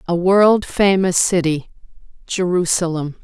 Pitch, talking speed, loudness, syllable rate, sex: 180 Hz, 75 wpm, -16 LUFS, 4.0 syllables/s, female